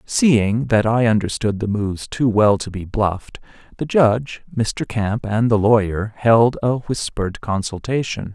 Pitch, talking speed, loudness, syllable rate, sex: 110 Hz, 160 wpm, -19 LUFS, 4.3 syllables/s, male